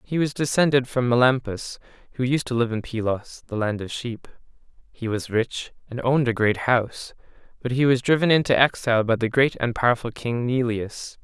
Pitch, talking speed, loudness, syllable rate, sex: 125 Hz, 190 wpm, -22 LUFS, 5.3 syllables/s, male